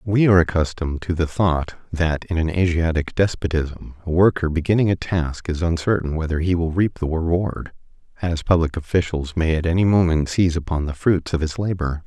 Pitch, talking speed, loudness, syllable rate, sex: 85 Hz, 190 wpm, -21 LUFS, 5.4 syllables/s, male